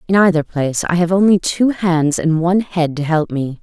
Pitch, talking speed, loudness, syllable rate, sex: 170 Hz, 230 wpm, -16 LUFS, 5.3 syllables/s, female